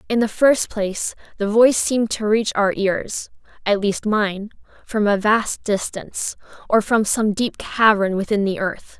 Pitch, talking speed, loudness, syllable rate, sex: 210 Hz, 160 wpm, -19 LUFS, 4.4 syllables/s, female